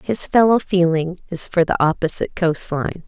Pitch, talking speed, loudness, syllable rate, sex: 170 Hz, 175 wpm, -18 LUFS, 4.8 syllables/s, female